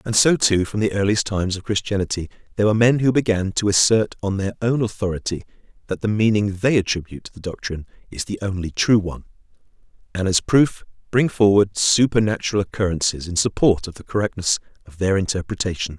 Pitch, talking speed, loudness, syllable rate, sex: 100 Hz, 180 wpm, -20 LUFS, 6.2 syllables/s, male